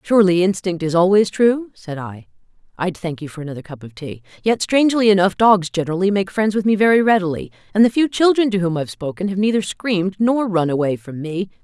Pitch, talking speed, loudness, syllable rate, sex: 190 Hz, 205 wpm, -18 LUFS, 6.0 syllables/s, female